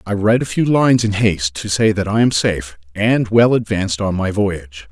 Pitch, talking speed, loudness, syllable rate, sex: 100 Hz, 220 wpm, -16 LUFS, 5.6 syllables/s, male